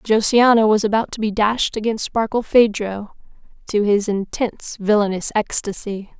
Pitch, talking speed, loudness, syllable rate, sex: 215 Hz, 125 wpm, -18 LUFS, 4.7 syllables/s, female